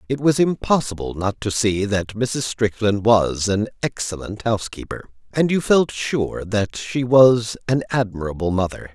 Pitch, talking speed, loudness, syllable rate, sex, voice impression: 110 Hz, 155 wpm, -20 LUFS, 4.4 syllables/s, male, masculine, middle-aged, tensed, powerful, bright, clear, very raspy, intellectual, mature, friendly, wild, lively, slightly sharp